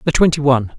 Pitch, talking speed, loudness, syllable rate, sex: 140 Hz, 230 wpm, -15 LUFS, 7.5 syllables/s, male